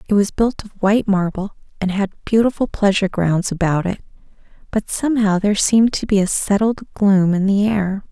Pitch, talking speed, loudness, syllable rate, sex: 200 Hz, 185 wpm, -18 LUFS, 5.5 syllables/s, female